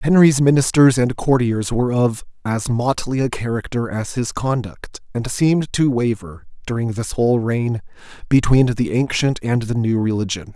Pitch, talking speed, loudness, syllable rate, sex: 120 Hz, 160 wpm, -19 LUFS, 4.7 syllables/s, male